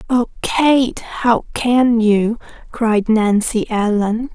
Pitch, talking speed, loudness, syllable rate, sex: 230 Hz, 110 wpm, -16 LUFS, 2.8 syllables/s, female